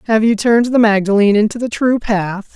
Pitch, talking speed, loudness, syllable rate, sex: 220 Hz, 210 wpm, -14 LUFS, 5.9 syllables/s, male